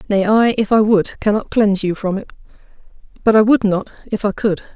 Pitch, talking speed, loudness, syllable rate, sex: 210 Hz, 215 wpm, -16 LUFS, 5.6 syllables/s, female